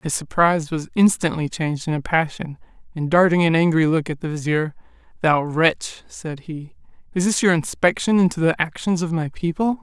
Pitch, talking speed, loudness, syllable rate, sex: 165 Hz, 175 wpm, -20 LUFS, 5.2 syllables/s, male